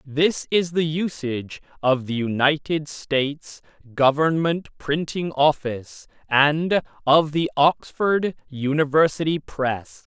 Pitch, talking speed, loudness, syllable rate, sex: 150 Hz, 100 wpm, -22 LUFS, 4.1 syllables/s, male